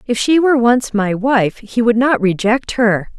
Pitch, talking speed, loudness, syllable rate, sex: 230 Hz, 205 wpm, -15 LUFS, 4.4 syllables/s, female